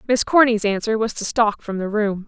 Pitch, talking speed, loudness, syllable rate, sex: 215 Hz, 240 wpm, -19 LUFS, 5.2 syllables/s, female